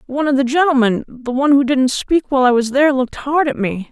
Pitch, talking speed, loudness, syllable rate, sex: 270 Hz, 260 wpm, -15 LUFS, 6.5 syllables/s, female